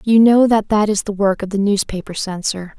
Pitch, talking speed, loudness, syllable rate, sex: 205 Hz, 235 wpm, -16 LUFS, 5.2 syllables/s, female